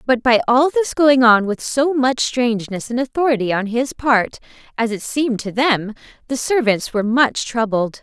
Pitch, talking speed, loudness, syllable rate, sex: 245 Hz, 185 wpm, -17 LUFS, 4.9 syllables/s, female